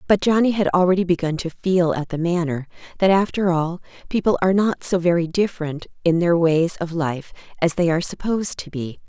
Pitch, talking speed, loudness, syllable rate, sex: 175 Hz, 200 wpm, -20 LUFS, 5.7 syllables/s, female